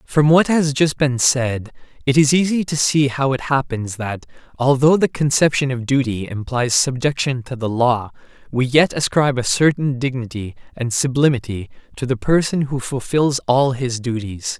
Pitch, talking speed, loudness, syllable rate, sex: 135 Hz, 170 wpm, -18 LUFS, 4.7 syllables/s, male